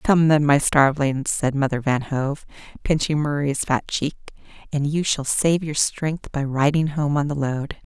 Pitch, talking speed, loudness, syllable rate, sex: 145 Hz, 180 wpm, -21 LUFS, 4.4 syllables/s, female